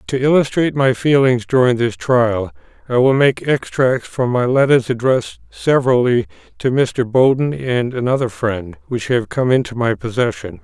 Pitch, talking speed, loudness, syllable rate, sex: 125 Hz, 160 wpm, -16 LUFS, 4.8 syllables/s, male